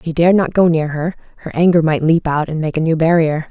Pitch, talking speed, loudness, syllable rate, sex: 160 Hz, 275 wpm, -15 LUFS, 6.1 syllables/s, female